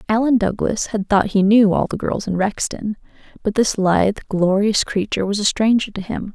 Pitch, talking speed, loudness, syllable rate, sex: 205 Hz, 200 wpm, -18 LUFS, 5.2 syllables/s, female